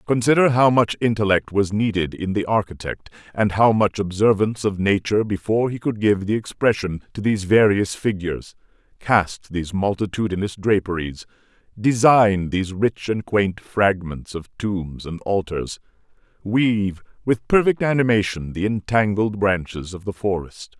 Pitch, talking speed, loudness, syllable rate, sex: 100 Hz, 135 wpm, -20 LUFS, 4.8 syllables/s, male